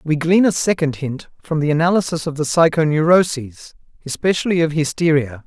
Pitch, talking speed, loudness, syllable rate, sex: 155 Hz, 155 wpm, -17 LUFS, 5.4 syllables/s, male